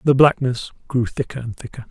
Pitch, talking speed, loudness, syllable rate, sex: 125 Hz, 190 wpm, -20 LUFS, 5.5 syllables/s, male